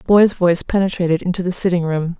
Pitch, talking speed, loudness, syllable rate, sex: 180 Hz, 220 wpm, -17 LUFS, 6.7 syllables/s, female